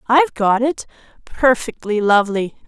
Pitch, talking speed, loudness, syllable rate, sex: 220 Hz, 110 wpm, -17 LUFS, 4.9 syllables/s, female